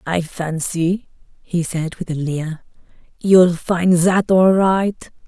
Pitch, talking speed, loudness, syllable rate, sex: 175 Hz, 135 wpm, -17 LUFS, 3.1 syllables/s, female